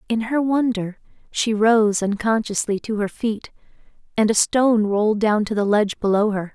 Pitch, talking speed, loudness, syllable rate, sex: 215 Hz, 175 wpm, -20 LUFS, 5.0 syllables/s, female